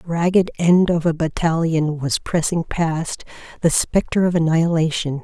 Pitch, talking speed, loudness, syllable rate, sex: 165 Hz, 150 wpm, -19 LUFS, 4.7 syllables/s, female